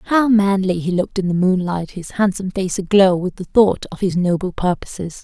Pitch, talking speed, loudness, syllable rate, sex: 190 Hz, 205 wpm, -18 LUFS, 5.3 syllables/s, female